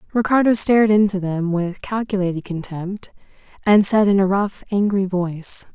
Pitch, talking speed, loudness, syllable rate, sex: 195 Hz, 145 wpm, -18 LUFS, 5.0 syllables/s, female